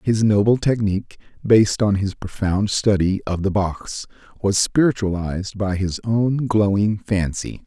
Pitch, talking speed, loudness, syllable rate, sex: 100 Hz, 140 wpm, -20 LUFS, 4.3 syllables/s, male